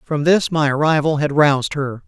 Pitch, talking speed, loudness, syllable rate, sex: 150 Hz, 205 wpm, -17 LUFS, 5.1 syllables/s, male